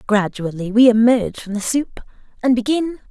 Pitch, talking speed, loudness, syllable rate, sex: 230 Hz, 155 wpm, -17 LUFS, 5.4 syllables/s, female